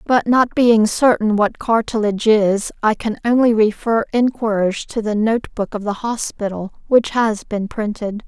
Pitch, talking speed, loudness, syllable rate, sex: 220 Hz, 165 wpm, -17 LUFS, 4.4 syllables/s, female